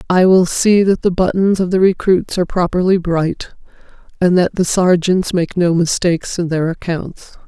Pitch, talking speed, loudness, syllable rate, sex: 180 Hz, 175 wpm, -15 LUFS, 4.7 syllables/s, female